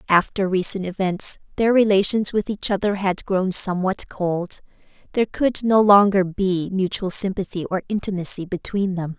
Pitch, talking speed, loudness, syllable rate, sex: 190 Hz, 150 wpm, -20 LUFS, 4.9 syllables/s, female